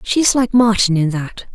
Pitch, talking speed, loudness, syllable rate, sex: 210 Hz, 235 wpm, -15 LUFS, 4.8 syllables/s, female